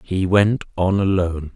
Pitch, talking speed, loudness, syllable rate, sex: 95 Hz, 155 wpm, -19 LUFS, 4.5 syllables/s, male